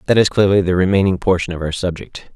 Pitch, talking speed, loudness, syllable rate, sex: 90 Hz, 230 wpm, -16 LUFS, 6.4 syllables/s, male